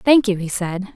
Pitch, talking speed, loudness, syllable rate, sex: 200 Hz, 250 wpm, -19 LUFS, 4.7 syllables/s, female